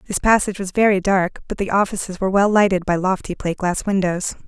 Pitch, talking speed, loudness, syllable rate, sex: 190 Hz, 215 wpm, -19 LUFS, 6.3 syllables/s, female